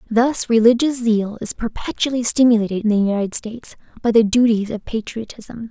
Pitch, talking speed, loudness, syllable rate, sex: 225 Hz, 160 wpm, -18 LUFS, 5.5 syllables/s, female